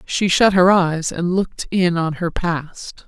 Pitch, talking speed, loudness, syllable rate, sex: 175 Hz, 195 wpm, -18 LUFS, 3.7 syllables/s, female